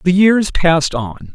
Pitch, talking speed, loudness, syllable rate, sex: 170 Hz, 180 wpm, -14 LUFS, 3.9 syllables/s, male